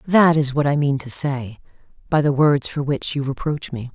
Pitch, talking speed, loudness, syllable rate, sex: 140 Hz, 230 wpm, -20 LUFS, 4.8 syllables/s, female